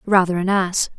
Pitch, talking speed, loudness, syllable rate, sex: 185 Hz, 180 wpm, -19 LUFS, 4.9 syllables/s, female